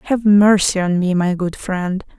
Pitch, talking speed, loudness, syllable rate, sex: 190 Hz, 195 wpm, -16 LUFS, 4.2 syllables/s, female